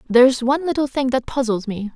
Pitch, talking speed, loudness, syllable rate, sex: 250 Hz, 245 wpm, -19 LUFS, 6.8 syllables/s, female